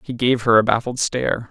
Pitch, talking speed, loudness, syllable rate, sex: 120 Hz, 240 wpm, -18 LUFS, 5.7 syllables/s, male